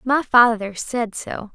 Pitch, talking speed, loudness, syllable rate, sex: 230 Hz, 155 wpm, -19 LUFS, 3.5 syllables/s, female